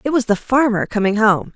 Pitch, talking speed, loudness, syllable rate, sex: 230 Hz, 230 wpm, -16 LUFS, 5.5 syllables/s, female